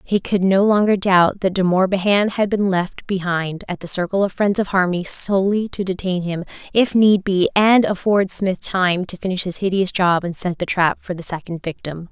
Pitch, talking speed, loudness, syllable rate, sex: 190 Hz, 215 wpm, -18 LUFS, 5.0 syllables/s, female